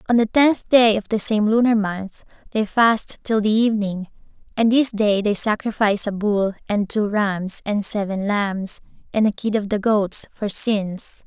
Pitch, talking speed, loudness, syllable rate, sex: 210 Hz, 185 wpm, -20 LUFS, 4.3 syllables/s, female